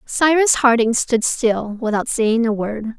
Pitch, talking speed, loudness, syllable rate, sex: 235 Hz, 160 wpm, -17 LUFS, 3.8 syllables/s, female